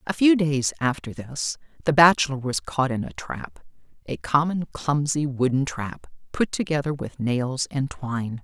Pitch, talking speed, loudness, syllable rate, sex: 140 Hz, 155 wpm, -24 LUFS, 4.4 syllables/s, female